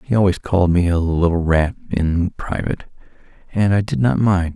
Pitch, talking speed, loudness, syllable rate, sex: 90 Hz, 185 wpm, -18 LUFS, 5.1 syllables/s, male